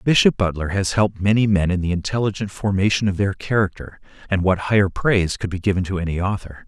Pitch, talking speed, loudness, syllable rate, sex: 95 Hz, 205 wpm, -20 LUFS, 6.2 syllables/s, male